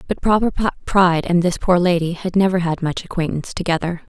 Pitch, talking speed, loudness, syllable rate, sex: 175 Hz, 190 wpm, -18 LUFS, 6.0 syllables/s, female